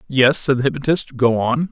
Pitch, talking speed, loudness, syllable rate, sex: 135 Hz, 210 wpm, -17 LUFS, 5.2 syllables/s, male